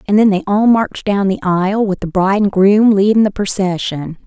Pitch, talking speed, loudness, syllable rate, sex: 200 Hz, 225 wpm, -14 LUFS, 5.5 syllables/s, female